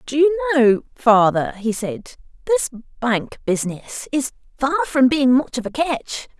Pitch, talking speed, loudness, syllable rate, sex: 260 Hz, 160 wpm, -19 LUFS, 4.3 syllables/s, female